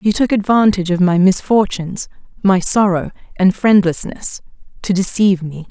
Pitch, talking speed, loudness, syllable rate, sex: 190 Hz, 135 wpm, -15 LUFS, 5.1 syllables/s, female